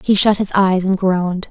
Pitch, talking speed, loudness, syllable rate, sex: 190 Hz, 240 wpm, -15 LUFS, 5.1 syllables/s, female